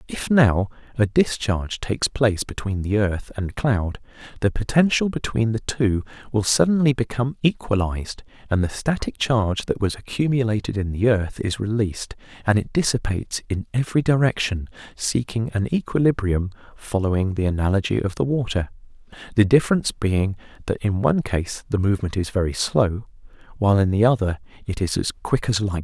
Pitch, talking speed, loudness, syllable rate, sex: 110 Hz, 160 wpm, -22 LUFS, 5.5 syllables/s, male